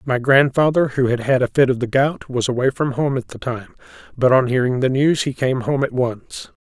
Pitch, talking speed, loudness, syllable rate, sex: 130 Hz, 245 wpm, -18 LUFS, 5.2 syllables/s, male